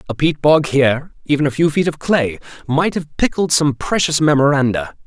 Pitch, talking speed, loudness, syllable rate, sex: 145 Hz, 190 wpm, -16 LUFS, 5.3 syllables/s, male